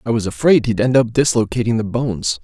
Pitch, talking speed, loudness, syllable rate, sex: 115 Hz, 220 wpm, -17 LUFS, 6.0 syllables/s, male